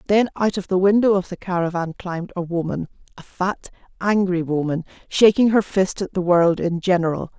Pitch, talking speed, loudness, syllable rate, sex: 185 Hz, 180 wpm, -20 LUFS, 5.3 syllables/s, female